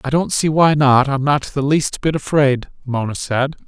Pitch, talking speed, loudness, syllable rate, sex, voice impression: 140 Hz, 210 wpm, -17 LUFS, 4.6 syllables/s, male, very masculine, very adult-like, slightly old, very thick, slightly tensed, slightly weak, slightly bright, slightly hard, slightly muffled, slightly fluent, slightly cool, intellectual, very sincere, very calm, mature, slightly friendly, slightly reassuring, slightly unique, very elegant, very kind, very modest